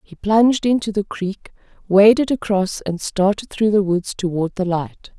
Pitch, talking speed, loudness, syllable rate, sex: 200 Hz, 175 wpm, -18 LUFS, 4.5 syllables/s, female